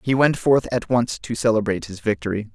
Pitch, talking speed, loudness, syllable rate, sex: 115 Hz, 210 wpm, -21 LUFS, 5.7 syllables/s, male